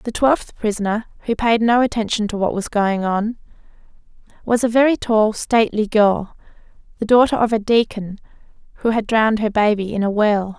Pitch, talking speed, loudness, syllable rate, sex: 220 Hz, 175 wpm, -18 LUFS, 5.2 syllables/s, female